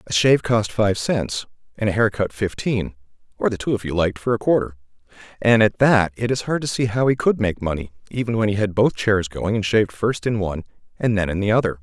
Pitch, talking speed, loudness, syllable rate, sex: 105 Hz, 250 wpm, -20 LUFS, 5.2 syllables/s, male